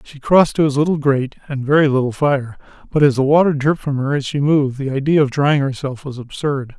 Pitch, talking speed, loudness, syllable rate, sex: 140 Hz, 240 wpm, -17 LUFS, 6.1 syllables/s, male